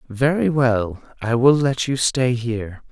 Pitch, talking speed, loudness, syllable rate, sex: 125 Hz, 165 wpm, -19 LUFS, 4.0 syllables/s, male